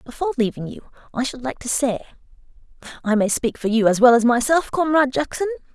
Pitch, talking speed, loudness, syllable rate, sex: 260 Hz, 190 wpm, -20 LUFS, 6.4 syllables/s, female